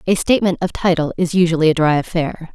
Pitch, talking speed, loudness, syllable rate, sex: 170 Hz, 210 wpm, -17 LUFS, 6.4 syllables/s, female